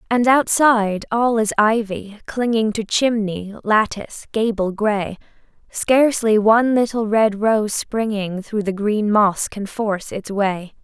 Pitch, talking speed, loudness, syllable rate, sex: 215 Hz, 140 wpm, -18 LUFS, 4.0 syllables/s, female